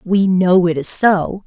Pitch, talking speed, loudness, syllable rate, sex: 185 Hz, 205 wpm, -14 LUFS, 3.5 syllables/s, female